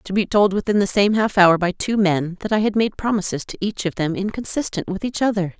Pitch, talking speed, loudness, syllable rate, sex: 200 Hz, 255 wpm, -20 LUFS, 5.8 syllables/s, female